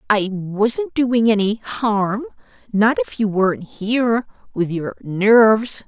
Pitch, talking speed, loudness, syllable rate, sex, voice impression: 215 Hz, 110 wpm, -18 LUFS, 3.6 syllables/s, female, very feminine, adult-like, slightly middle-aged, very thin, tensed, slightly powerful, bright, soft, very clear, fluent, slightly cute, intellectual, very refreshing, sincere, calm, very friendly, reassuring, unique, elegant, slightly wild, sweet, slightly lively, slightly kind, sharp